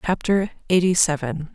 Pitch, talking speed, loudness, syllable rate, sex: 170 Hz, 115 wpm, -21 LUFS, 5.0 syllables/s, female